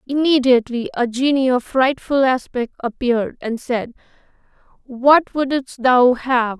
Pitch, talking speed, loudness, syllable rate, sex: 255 Hz, 120 wpm, -18 LUFS, 4.1 syllables/s, female